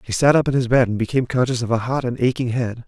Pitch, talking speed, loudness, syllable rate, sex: 125 Hz, 315 wpm, -19 LUFS, 7.0 syllables/s, male